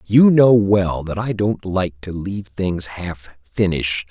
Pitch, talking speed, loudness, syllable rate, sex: 95 Hz, 175 wpm, -18 LUFS, 4.0 syllables/s, male